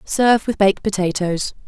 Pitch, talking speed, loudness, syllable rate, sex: 200 Hz, 145 wpm, -18 LUFS, 5.4 syllables/s, female